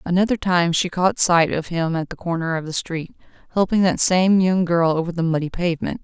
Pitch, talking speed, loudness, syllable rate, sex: 175 Hz, 220 wpm, -20 LUFS, 5.4 syllables/s, female